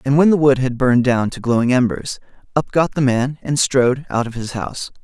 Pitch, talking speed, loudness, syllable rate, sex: 130 Hz, 240 wpm, -17 LUFS, 5.7 syllables/s, male